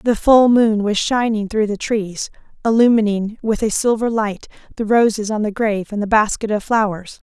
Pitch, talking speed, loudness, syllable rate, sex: 215 Hz, 190 wpm, -17 LUFS, 5.0 syllables/s, female